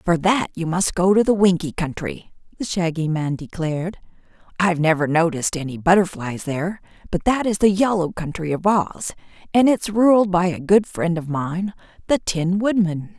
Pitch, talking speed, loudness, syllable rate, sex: 180 Hz, 175 wpm, -20 LUFS, 5.0 syllables/s, female